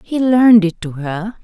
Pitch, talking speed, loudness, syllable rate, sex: 205 Hz, 210 wpm, -13 LUFS, 4.5 syllables/s, female